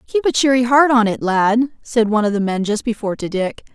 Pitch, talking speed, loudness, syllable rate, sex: 230 Hz, 255 wpm, -17 LUFS, 6.0 syllables/s, female